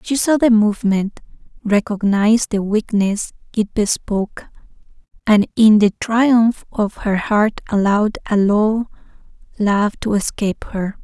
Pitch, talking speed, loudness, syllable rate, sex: 210 Hz, 125 wpm, -17 LUFS, 4.1 syllables/s, female